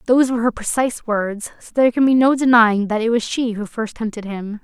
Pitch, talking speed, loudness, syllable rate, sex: 230 Hz, 245 wpm, -18 LUFS, 6.0 syllables/s, female